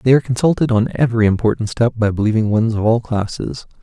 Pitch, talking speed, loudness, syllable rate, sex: 115 Hz, 205 wpm, -17 LUFS, 6.4 syllables/s, male